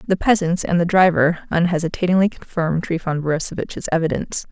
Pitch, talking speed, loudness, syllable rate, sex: 170 Hz, 135 wpm, -19 LUFS, 6.2 syllables/s, female